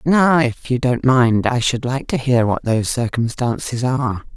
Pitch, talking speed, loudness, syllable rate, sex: 125 Hz, 195 wpm, -18 LUFS, 4.6 syllables/s, female